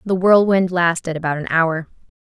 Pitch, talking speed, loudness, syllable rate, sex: 175 Hz, 160 wpm, -17 LUFS, 5.1 syllables/s, female